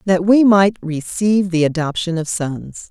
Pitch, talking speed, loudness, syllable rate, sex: 180 Hz, 165 wpm, -16 LUFS, 4.3 syllables/s, female